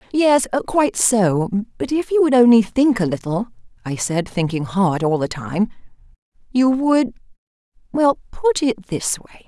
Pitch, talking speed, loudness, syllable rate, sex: 220 Hz, 150 wpm, -18 LUFS, 4.4 syllables/s, female